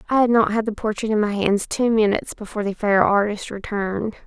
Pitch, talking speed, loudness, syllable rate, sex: 210 Hz, 225 wpm, -21 LUFS, 6.0 syllables/s, female